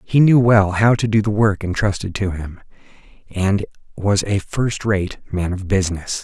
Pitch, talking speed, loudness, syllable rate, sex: 100 Hz, 185 wpm, -18 LUFS, 4.4 syllables/s, male